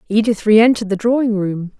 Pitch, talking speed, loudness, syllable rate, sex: 215 Hz, 165 wpm, -15 LUFS, 6.3 syllables/s, female